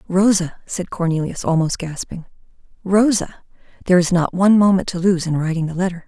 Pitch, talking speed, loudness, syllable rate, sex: 180 Hz, 170 wpm, -18 LUFS, 5.8 syllables/s, female